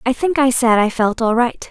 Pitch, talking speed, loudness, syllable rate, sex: 245 Hz, 280 wpm, -16 LUFS, 5.0 syllables/s, female